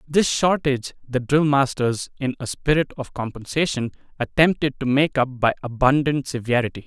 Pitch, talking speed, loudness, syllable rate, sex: 135 Hz, 150 wpm, -21 LUFS, 5.1 syllables/s, male